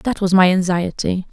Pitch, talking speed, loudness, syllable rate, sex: 185 Hz, 180 wpm, -16 LUFS, 4.8 syllables/s, female